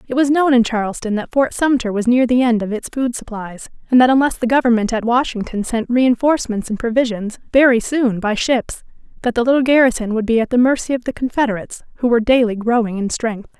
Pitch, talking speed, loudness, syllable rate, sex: 240 Hz, 215 wpm, -17 LUFS, 6.0 syllables/s, female